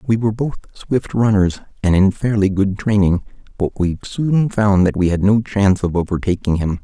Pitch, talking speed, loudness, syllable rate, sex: 100 Hz, 195 wpm, -17 LUFS, 5.2 syllables/s, male